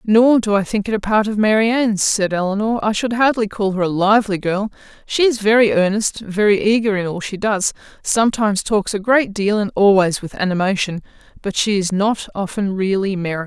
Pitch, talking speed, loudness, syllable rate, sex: 205 Hz, 185 wpm, -17 LUFS, 5.4 syllables/s, female